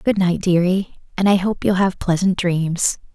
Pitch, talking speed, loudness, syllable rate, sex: 185 Hz, 190 wpm, -18 LUFS, 4.4 syllables/s, female